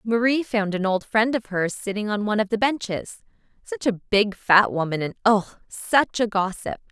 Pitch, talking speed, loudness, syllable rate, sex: 210 Hz, 190 wpm, -22 LUFS, 5.0 syllables/s, female